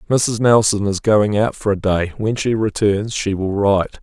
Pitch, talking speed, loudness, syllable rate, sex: 105 Hz, 210 wpm, -17 LUFS, 4.6 syllables/s, male